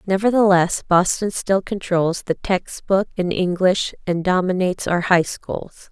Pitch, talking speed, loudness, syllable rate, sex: 185 Hz, 140 wpm, -19 LUFS, 4.1 syllables/s, female